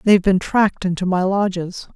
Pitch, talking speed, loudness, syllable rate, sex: 190 Hz, 215 wpm, -18 LUFS, 5.6 syllables/s, female